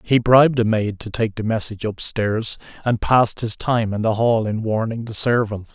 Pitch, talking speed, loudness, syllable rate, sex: 110 Hz, 210 wpm, -20 LUFS, 5.0 syllables/s, male